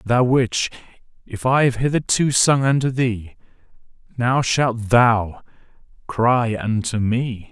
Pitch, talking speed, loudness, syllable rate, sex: 120 Hz, 110 wpm, -19 LUFS, 3.5 syllables/s, male